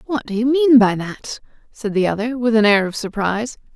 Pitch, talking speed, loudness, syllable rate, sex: 230 Hz, 225 wpm, -17 LUFS, 5.5 syllables/s, female